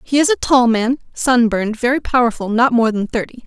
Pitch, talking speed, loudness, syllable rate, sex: 240 Hz, 210 wpm, -16 LUFS, 5.6 syllables/s, female